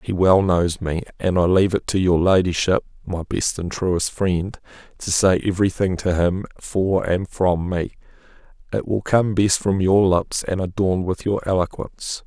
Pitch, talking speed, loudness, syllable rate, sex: 95 Hz, 185 wpm, -20 LUFS, 4.5 syllables/s, male